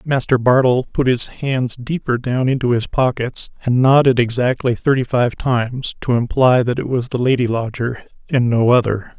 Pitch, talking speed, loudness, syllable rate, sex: 125 Hz, 175 wpm, -17 LUFS, 4.8 syllables/s, male